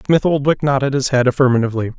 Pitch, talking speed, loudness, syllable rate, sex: 135 Hz, 180 wpm, -16 LUFS, 7.2 syllables/s, male